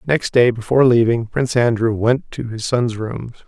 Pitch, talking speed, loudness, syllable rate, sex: 120 Hz, 190 wpm, -17 LUFS, 5.0 syllables/s, male